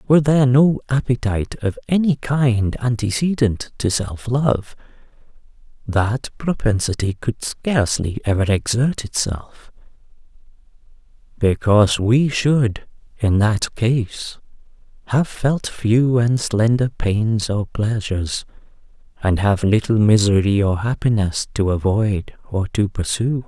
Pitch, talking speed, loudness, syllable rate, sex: 115 Hz, 110 wpm, -19 LUFS, 4.0 syllables/s, male